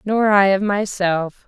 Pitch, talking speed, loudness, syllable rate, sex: 195 Hz, 165 wpm, -17 LUFS, 3.7 syllables/s, female